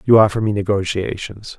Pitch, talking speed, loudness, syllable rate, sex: 105 Hz, 150 wpm, -18 LUFS, 5.4 syllables/s, male